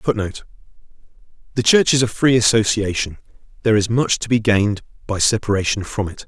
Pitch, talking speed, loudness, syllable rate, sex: 110 Hz, 160 wpm, -18 LUFS, 6.1 syllables/s, male